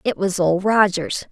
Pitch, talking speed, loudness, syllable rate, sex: 190 Hz, 185 wpm, -18 LUFS, 4.1 syllables/s, female